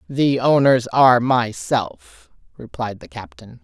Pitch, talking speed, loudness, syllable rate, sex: 125 Hz, 115 wpm, -17 LUFS, 3.7 syllables/s, female